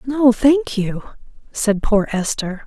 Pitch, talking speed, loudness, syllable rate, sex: 230 Hz, 135 wpm, -18 LUFS, 3.2 syllables/s, female